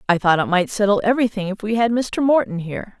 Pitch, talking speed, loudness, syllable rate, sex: 210 Hz, 240 wpm, -19 LUFS, 6.4 syllables/s, female